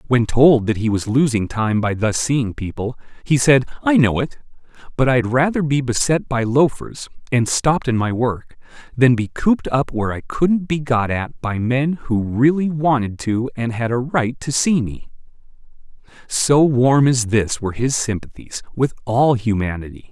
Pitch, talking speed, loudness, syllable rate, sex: 125 Hz, 180 wpm, -18 LUFS, 4.6 syllables/s, male